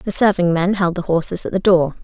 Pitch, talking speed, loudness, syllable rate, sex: 180 Hz, 265 wpm, -17 LUFS, 5.6 syllables/s, female